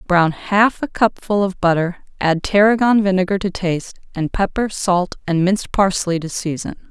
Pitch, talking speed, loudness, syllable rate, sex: 190 Hz, 165 wpm, -18 LUFS, 4.7 syllables/s, female